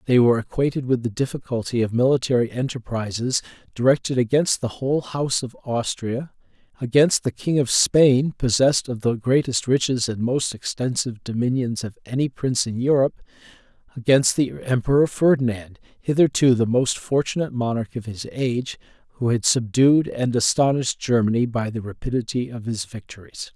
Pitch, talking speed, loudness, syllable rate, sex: 125 Hz, 150 wpm, -21 LUFS, 5.4 syllables/s, male